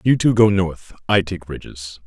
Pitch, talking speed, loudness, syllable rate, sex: 95 Hz, 175 wpm, -18 LUFS, 4.4 syllables/s, male